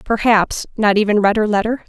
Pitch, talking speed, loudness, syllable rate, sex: 210 Hz, 160 wpm, -16 LUFS, 5.4 syllables/s, female